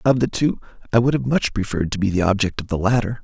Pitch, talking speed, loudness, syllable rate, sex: 110 Hz, 280 wpm, -20 LUFS, 6.7 syllables/s, male